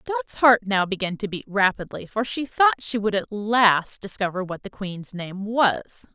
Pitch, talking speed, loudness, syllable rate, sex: 210 Hz, 195 wpm, -23 LUFS, 4.4 syllables/s, female